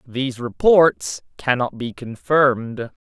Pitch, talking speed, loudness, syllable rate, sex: 125 Hz, 100 wpm, -19 LUFS, 3.7 syllables/s, male